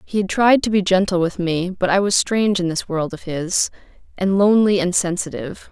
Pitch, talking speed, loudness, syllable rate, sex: 185 Hz, 220 wpm, -18 LUFS, 5.5 syllables/s, female